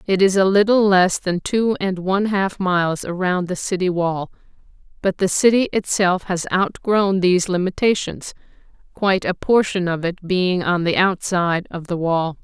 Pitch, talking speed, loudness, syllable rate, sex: 185 Hz, 170 wpm, -19 LUFS, 4.7 syllables/s, female